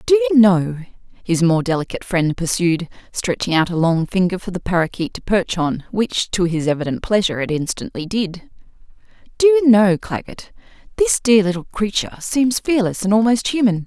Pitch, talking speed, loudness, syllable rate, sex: 195 Hz, 175 wpm, -18 LUFS, 5.3 syllables/s, female